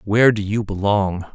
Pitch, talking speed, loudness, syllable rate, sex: 100 Hz, 180 wpm, -19 LUFS, 5.1 syllables/s, male